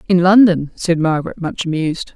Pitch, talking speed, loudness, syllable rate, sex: 170 Hz, 165 wpm, -15 LUFS, 5.7 syllables/s, female